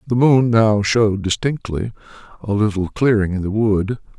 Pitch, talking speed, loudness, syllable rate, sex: 110 Hz, 160 wpm, -18 LUFS, 4.9 syllables/s, male